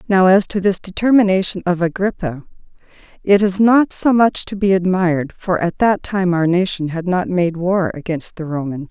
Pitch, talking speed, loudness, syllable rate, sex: 185 Hz, 190 wpm, -17 LUFS, 4.9 syllables/s, female